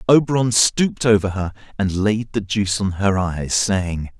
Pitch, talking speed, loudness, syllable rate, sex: 100 Hz, 170 wpm, -19 LUFS, 4.6 syllables/s, male